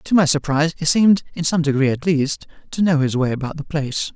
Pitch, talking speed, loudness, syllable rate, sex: 155 Hz, 245 wpm, -19 LUFS, 6.2 syllables/s, male